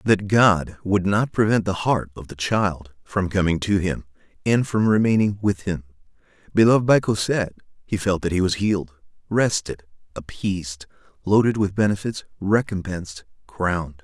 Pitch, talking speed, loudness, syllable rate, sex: 95 Hz, 150 wpm, -21 LUFS, 4.9 syllables/s, male